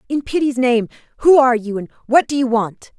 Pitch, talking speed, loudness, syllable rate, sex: 250 Hz, 220 wpm, -16 LUFS, 5.7 syllables/s, female